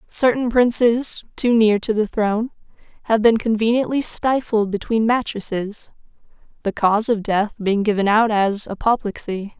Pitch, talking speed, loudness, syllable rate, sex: 220 Hz, 140 wpm, -19 LUFS, 4.6 syllables/s, female